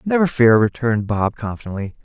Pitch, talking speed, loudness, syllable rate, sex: 120 Hz, 145 wpm, -18 LUFS, 5.9 syllables/s, male